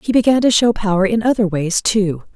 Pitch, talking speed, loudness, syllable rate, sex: 205 Hz, 230 wpm, -16 LUFS, 5.5 syllables/s, female